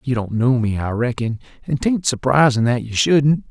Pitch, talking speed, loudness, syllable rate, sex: 125 Hz, 205 wpm, -18 LUFS, 4.7 syllables/s, male